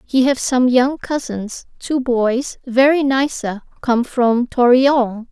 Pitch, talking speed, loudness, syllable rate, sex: 250 Hz, 145 wpm, -17 LUFS, 3.3 syllables/s, female